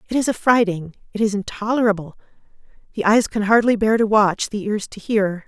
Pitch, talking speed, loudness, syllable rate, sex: 210 Hz, 185 wpm, -19 LUFS, 5.6 syllables/s, female